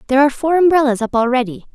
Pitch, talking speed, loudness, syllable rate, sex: 265 Hz, 205 wpm, -15 LUFS, 8.1 syllables/s, female